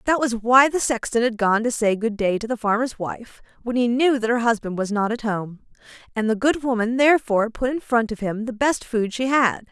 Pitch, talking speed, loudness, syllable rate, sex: 235 Hz, 245 wpm, -21 LUFS, 5.3 syllables/s, female